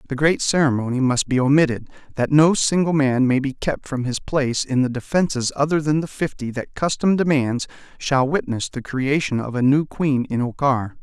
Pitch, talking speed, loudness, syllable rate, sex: 140 Hz, 195 wpm, -20 LUFS, 5.1 syllables/s, male